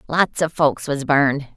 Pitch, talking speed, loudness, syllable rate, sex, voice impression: 145 Hz, 190 wpm, -19 LUFS, 4.4 syllables/s, female, feminine, very adult-like, very unique